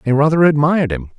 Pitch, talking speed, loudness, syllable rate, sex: 145 Hz, 200 wpm, -14 LUFS, 6.8 syllables/s, male